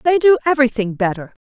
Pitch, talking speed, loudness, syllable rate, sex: 255 Hz, 170 wpm, -16 LUFS, 6.8 syllables/s, female